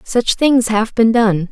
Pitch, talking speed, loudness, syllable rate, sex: 225 Hz, 195 wpm, -14 LUFS, 3.6 syllables/s, female